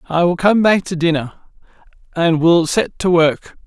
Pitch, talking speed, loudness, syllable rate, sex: 170 Hz, 180 wpm, -15 LUFS, 4.6 syllables/s, male